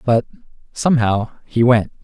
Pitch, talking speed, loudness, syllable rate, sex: 115 Hz, 120 wpm, -17 LUFS, 4.8 syllables/s, male